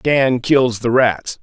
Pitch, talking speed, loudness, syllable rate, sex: 125 Hz, 170 wpm, -15 LUFS, 2.9 syllables/s, male